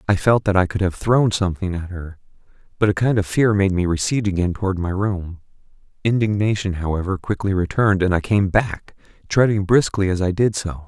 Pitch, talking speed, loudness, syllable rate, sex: 95 Hz, 200 wpm, -20 LUFS, 5.7 syllables/s, male